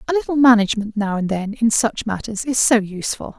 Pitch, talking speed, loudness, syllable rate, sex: 225 Hz, 215 wpm, -18 LUFS, 5.9 syllables/s, female